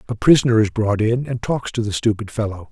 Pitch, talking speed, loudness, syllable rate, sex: 115 Hz, 245 wpm, -19 LUFS, 5.9 syllables/s, male